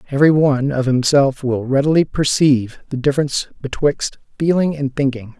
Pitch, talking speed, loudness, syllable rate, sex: 140 Hz, 145 wpm, -17 LUFS, 5.7 syllables/s, male